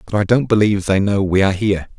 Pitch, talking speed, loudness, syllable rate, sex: 100 Hz, 270 wpm, -16 LUFS, 7.2 syllables/s, male